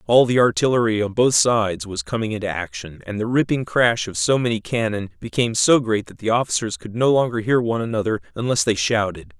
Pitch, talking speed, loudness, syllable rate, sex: 110 Hz, 210 wpm, -20 LUFS, 5.9 syllables/s, male